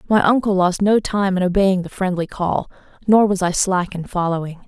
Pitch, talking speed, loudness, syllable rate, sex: 190 Hz, 205 wpm, -18 LUFS, 5.2 syllables/s, female